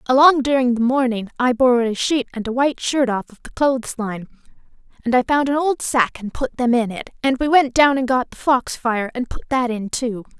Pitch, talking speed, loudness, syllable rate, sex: 250 Hz, 240 wpm, -19 LUFS, 5.5 syllables/s, female